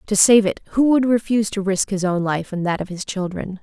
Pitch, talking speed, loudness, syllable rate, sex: 200 Hz, 265 wpm, -19 LUFS, 5.7 syllables/s, female